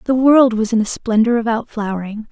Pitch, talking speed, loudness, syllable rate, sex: 225 Hz, 235 wpm, -16 LUFS, 5.6 syllables/s, female